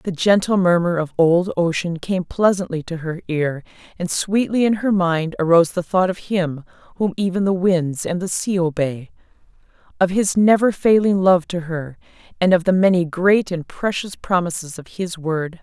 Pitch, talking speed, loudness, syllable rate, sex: 180 Hz, 180 wpm, -19 LUFS, 4.7 syllables/s, female